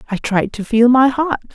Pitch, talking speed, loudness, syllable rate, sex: 240 Hz, 235 wpm, -15 LUFS, 5.0 syllables/s, female